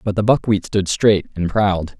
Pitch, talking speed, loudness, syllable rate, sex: 100 Hz, 210 wpm, -18 LUFS, 4.5 syllables/s, male